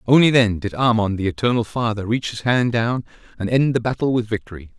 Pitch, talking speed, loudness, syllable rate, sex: 115 Hz, 215 wpm, -20 LUFS, 5.8 syllables/s, male